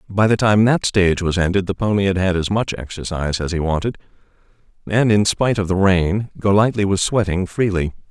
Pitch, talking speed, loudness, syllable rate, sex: 95 Hz, 200 wpm, -18 LUFS, 5.7 syllables/s, male